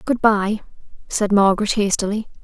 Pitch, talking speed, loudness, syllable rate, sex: 210 Hz, 125 wpm, -19 LUFS, 5.1 syllables/s, female